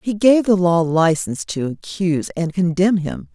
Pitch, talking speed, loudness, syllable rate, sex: 180 Hz, 180 wpm, -18 LUFS, 4.7 syllables/s, female